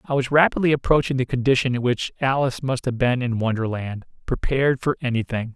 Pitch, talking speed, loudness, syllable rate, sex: 130 Hz, 175 wpm, -22 LUFS, 6.0 syllables/s, male